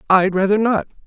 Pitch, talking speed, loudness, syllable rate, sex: 190 Hz, 170 wpm, -17 LUFS, 5.6 syllables/s, male